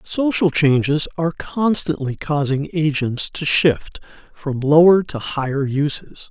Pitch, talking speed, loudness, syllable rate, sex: 150 Hz, 125 wpm, -18 LUFS, 4.0 syllables/s, male